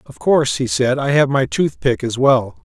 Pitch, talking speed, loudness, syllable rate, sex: 135 Hz, 220 wpm, -17 LUFS, 4.7 syllables/s, male